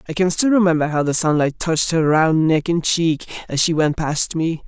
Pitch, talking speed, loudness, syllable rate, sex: 160 Hz, 230 wpm, -18 LUFS, 5.2 syllables/s, male